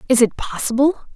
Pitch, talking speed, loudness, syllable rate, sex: 245 Hz, 155 wpm, -18 LUFS, 5.9 syllables/s, female